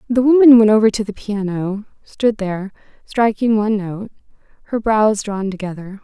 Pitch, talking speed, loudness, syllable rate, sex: 210 Hz, 130 wpm, -16 LUFS, 5.0 syllables/s, female